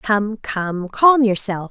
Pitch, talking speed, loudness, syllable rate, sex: 215 Hz, 140 wpm, -17 LUFS, 3.0 syllables/s, female